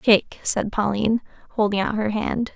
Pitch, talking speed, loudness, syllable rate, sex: 210 Hz, 165 wpm, -22 LUFS, 5.3 syllables/s, female